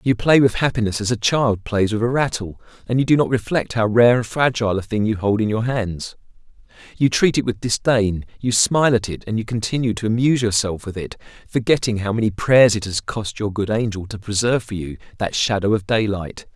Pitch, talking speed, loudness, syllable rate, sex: 110 Hz, 225 wpm, -19 LUFS, 5.7 syllables/s, male